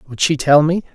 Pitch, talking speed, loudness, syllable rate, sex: 150 Hz, 255 wpm, -15 LUFS, 4.9 syllables/s, male